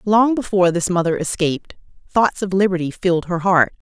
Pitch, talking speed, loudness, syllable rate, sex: 185 Hz, 170 wpm, -18 LUFS, 5.7 syllables/s, female